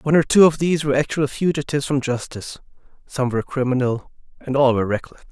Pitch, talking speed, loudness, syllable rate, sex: 135 Hz, 190 wpm, -20 LUFS, 6.9 syllables/s, male